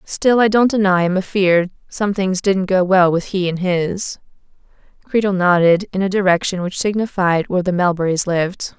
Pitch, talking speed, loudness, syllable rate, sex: 185 Hz, 180 wpm, -17 LUFS, 5.1 syllables/s, female